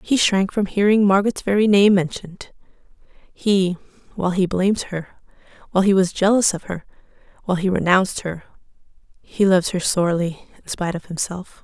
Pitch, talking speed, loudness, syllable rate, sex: 190 Hz, 145 wpm, -19 LUFS, 5.8 syllables/s, female